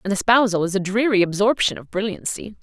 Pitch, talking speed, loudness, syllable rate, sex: 205 Hz, 185 wpm, -20 LUFS, 6.1 syllables/s, female